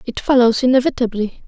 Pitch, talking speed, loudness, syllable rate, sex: 245 Hz, 120 wpm, -16 LUFS, 5.9 syllables/s, female